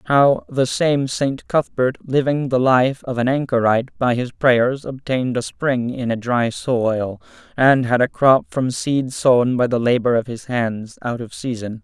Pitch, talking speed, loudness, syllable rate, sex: 125 Hz, 190 wpm, -19 LUFS, 4.2 syllables/s, male